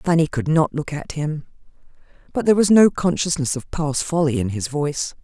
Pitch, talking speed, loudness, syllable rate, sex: 155 Hz, 195 wpm, -20 LUFS, 5.4 syllables/s, female